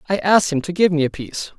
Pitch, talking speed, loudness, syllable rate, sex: 165 Hz, 300 wpm, -18 LUFS, 7.3 syllables/s, male